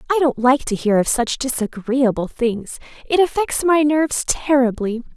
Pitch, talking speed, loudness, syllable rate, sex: 260 Hz, 165 wpm, -18 LUFS, 4.7 syllables/s, female